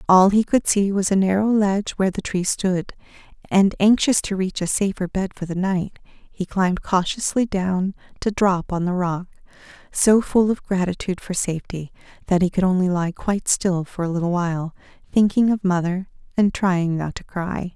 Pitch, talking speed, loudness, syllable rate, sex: 190 Hz, 190 wpm, -21 LUFS, 5.0 syllables/s, female